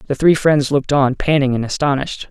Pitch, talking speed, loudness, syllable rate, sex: 140 Hz, 210 wpm, -16 LUFS, 6.1 syllables/s, male